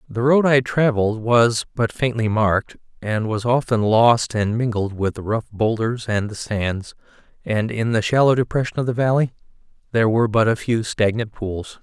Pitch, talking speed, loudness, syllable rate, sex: 115 Hz, 185 wpm, -20 LUFS, 4.9 syllables/s, male